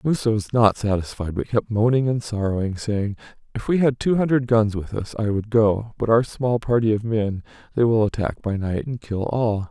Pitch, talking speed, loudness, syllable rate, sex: 110 Hz, 215 wpm, -22 LUFS, 5.0 syllables/s, male